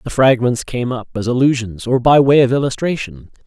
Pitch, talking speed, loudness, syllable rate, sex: 125 Hz, 190 wpm, -15 LUFS, 5.4 syllables/s, male